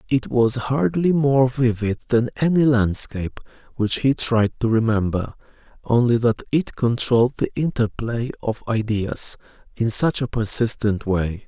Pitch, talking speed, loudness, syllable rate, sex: 120 Hz, 135 wpm, -20 LUFS, 4.2 syllables/s, male